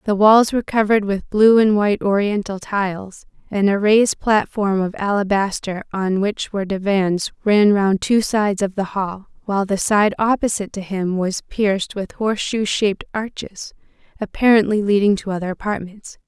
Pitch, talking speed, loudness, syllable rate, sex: 200 Hz, 160 wpm, -18 LUFS, 5.1 syllables/s, female